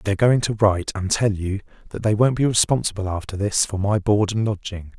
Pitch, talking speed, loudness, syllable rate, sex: 105 Hz, 230 wpm, -21 LUFS, 5.8 syllables/s, male